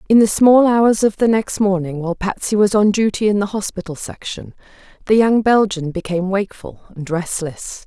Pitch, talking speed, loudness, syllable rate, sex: 200 Hz, 185 wpm, -17 LUFS, 5.2 syllables/s, female